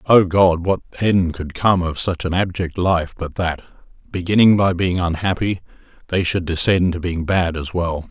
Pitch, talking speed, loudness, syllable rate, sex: 90 Hz, 185 wpm, -19 LUFS, 4.6 syllables/s, male